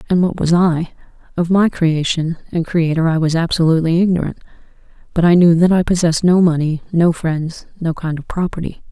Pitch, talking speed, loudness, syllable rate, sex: 165 Hz, 180 wpm, -16 LUFS, 5.6 syllables/s, female